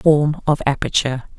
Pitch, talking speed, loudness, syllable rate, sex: 145 Hz, 130 wpm, -18 LUFS, 4.8 syllables/s, female